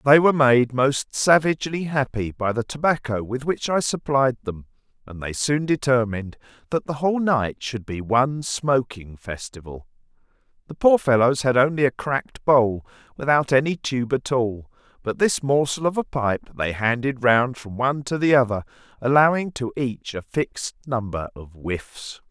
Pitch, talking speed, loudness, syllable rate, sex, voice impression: 130 Hz, 165 wpm, -22 LUFS, 4.8 syllables/s, male, masculine, adult-like, slightly thick, cool, slightly intellectual, slightly calm, slightly elegant